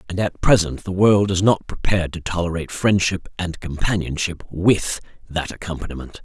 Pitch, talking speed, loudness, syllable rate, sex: 90 Hz, 155 wpm, -21 LUFS, 5.3 syllables/s, male